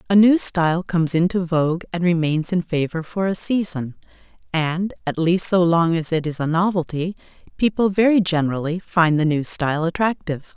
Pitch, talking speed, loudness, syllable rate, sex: 170 Hz, 175 wpm, -20 LUFS, 5.3 syllables/s, female